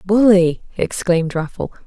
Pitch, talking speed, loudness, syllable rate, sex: 185 Hz, 95 wpm, -17 LUFS, 4.6 syllables/s, female